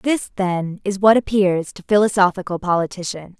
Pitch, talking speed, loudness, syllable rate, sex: 190 Hz, 140 wpm, -19 LUFS, 4.9 syllables/s, female